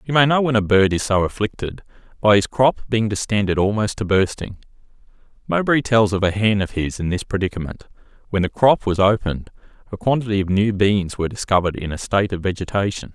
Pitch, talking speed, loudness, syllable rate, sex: 105 Hz, 200 wpm, -19 LUFS, 6.0 syllables/s, male